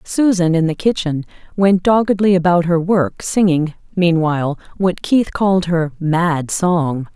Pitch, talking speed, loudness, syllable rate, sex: 175 Hz, 145 wpm, -16 LUFS, 4.2 syllables/s, female